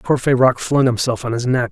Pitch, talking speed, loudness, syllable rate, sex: 125 Hz, 210 wpm, -17 LUFS, 5.4 syllables/s, male